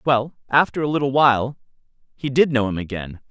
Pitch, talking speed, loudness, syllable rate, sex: 130 Hz, 180 wpm, -20 LUFS, 5.8 syllables/s, male